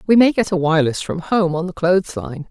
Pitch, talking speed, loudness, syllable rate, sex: 175 Hz, 265 wpm, -18 LUFS, 5.9 syllables/s, female